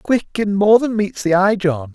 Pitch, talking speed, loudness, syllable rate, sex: 195 Hz, 245 wpm, -16 LUFS, 4.2 syllables/s, male